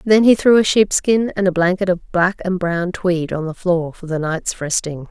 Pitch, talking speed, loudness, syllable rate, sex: 180 Hz, 235 wpm, -17 LUFS, 4.6 syllables/s, female